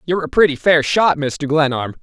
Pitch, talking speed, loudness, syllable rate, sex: 155 Hz, 210 wpm, -16 LUFS, 5.5 syllables/s, male